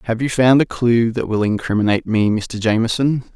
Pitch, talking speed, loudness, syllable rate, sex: 115 Hz, 195 wpm, -17 LUFS, 5.5 syllables/s, male